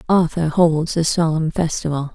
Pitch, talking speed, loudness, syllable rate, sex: 160 Hz, 140 wpm, -18 LUFS, 4.6 syllables/s, female